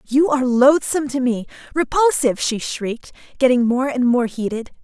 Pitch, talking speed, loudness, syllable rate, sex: 250 Hz, 160 wpm, -18 LUFS, 5.4 syllables/s, female